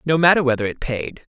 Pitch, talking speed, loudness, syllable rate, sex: 135 Hz, 220 wpm, -19 LUFS, 5.9 syllables/s, male